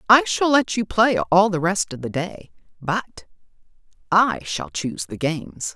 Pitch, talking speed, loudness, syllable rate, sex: 175 Hz, 175 wpm, -21 LUFS, 4.3 syllables/s, female